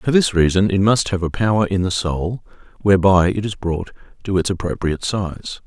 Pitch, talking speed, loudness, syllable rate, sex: 95 Hz, 200 wpm, -18 LUFS, 5.3 syllables/s, male